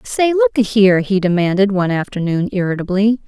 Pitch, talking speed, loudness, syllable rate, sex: 205 Hz, 165 wpm, -15 LUFS, 5.9 syllables/s, female